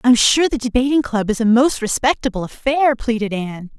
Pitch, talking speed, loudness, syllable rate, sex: 240 Hz, 190 wpm, -17 LUFS, 5.5 syllables/s, female